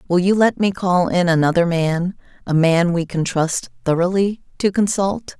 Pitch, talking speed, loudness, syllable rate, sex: 180 Hz, 180 wpm, -18 LUFS, 4.6 syllables/s, female